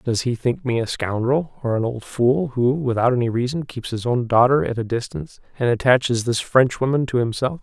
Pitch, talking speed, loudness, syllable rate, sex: 125 Hz, 215 wpm, -20 LUFS, 5.3 syllables/s, male